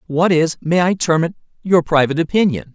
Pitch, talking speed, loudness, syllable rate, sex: 165 Hz, 195 wpm, -16 LUFS, 5.7 syllables/s, male